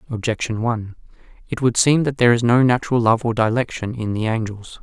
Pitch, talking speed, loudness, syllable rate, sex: 115 Hz, 200 wpm, -19 LUFS, 6.1 syllables/s, male